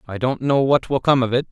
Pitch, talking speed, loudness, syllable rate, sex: 130 Hz, 315 wpm, -19 LUFS, 6.0 syllables/s, male